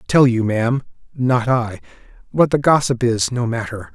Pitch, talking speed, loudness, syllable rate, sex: 125 Hz, 150 wpm, -18 LUFS, 4.7 syllables/s, male